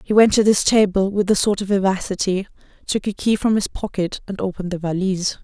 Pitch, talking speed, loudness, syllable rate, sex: 195 Hz, 220 wpm, -19 LUFS, 5.9 syllables/s, female